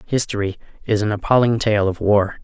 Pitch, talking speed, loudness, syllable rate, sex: 105 Hz, 175 wpm, -19 LUFS, 5.5 syllables/s, male